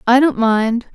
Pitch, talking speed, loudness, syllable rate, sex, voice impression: 240 Hz, 190 wpm, -15 LUFS, 4.1 syllables/s, female, feminine, very adult-like, slightly tensed, sincere, slightly elegant, slightly sweet